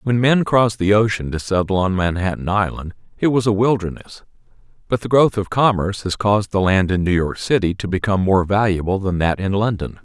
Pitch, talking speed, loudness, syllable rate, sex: 100 Hz, 210 wpm, -18 LUFS, 5.8 syllables/s, male